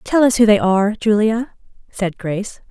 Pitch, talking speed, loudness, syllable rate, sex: 210 Hz, 175 wpm, -16 LUFS, 5.0 syllables/s, female